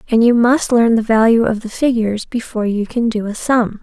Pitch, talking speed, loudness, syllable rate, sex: 230 Hz, 235 wpm, -15 LUFS, 5.5 syllables/s, female